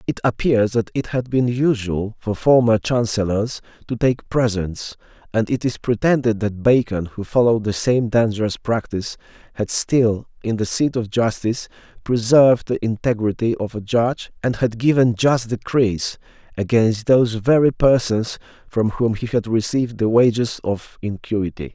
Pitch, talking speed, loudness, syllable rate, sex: 115 Hz, 155 wpm, -19 LUFS, 4.8 syllables/s, male